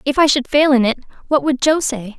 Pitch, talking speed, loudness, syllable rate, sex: 270 Hz, 275 wpm, -16 LUFS, 5.5 syllables/s, female